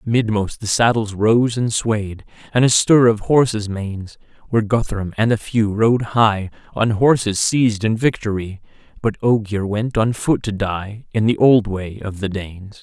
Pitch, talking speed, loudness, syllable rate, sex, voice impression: 110 Hz, 180 wpm, -18 LUFS, 4.4 syllables/s, male, very masculine, very adult-like, slightly thick, cool, slightly sincere, calm